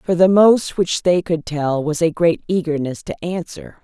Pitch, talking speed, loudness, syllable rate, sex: 170 Hz, 205 wpm, -18 LUFS, 4.4 syllables/s, female